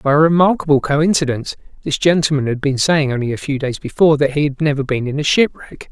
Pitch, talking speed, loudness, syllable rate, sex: 145 Hz, 225 wpm, -16 LUFS, 6.3 syllables/s, male